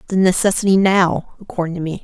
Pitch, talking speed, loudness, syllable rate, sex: 185 Hz, 205 wpm, -16 LUFS, 6.5 syllables/s, female